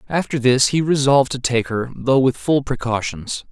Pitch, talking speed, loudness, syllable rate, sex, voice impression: 130 Hz, 190 wpm, -18 LUFS, 4.9 syllables/s, male, very masculine, very adult-like, thick, tensed, powerful, bright, hard, clear, fluent, cool, intellectual, slightly refreshing, very sincere, slightly calm, slightly friendly, slightly reassuring, slightly unique, slightly elegant, wild, slightly sweet, lively, slightly kind, intense